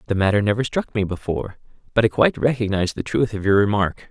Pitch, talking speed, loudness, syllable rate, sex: 105 Hz, 220 wpm, -20 LUFS, 6.7 syllables/s, male